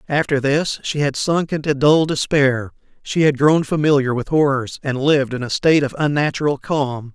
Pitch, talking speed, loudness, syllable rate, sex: 140 Hz, 185 wpm, -18 LUFS, 5.0 syllables/s, male